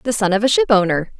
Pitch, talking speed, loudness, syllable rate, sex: 190 Hz, 250 wpm, -16 LUFS, 6.8 syllables/s, female